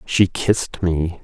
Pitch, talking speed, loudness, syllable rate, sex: 90 Hz, 145 wpm, -19 LUFS, 3.5 syllables/s, male